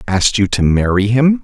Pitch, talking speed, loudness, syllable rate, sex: 115 Hz, 210 wpm, -14 LUFS, 5.4 syllables/s, male